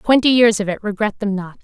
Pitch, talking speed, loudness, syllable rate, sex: 210 Hz, 255 wpm, -17 LUFS, 5.7 syllables/s, female